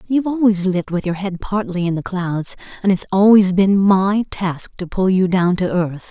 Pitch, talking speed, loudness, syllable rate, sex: 190 Hz, 215 wpm, -17 LUFS, 4.9 syllables/s, female